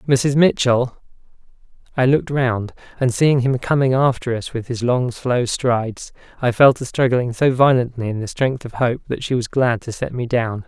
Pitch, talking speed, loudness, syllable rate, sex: 125 Hz, 195 wpm, -18 LUFS, 4.8 syllables/s, male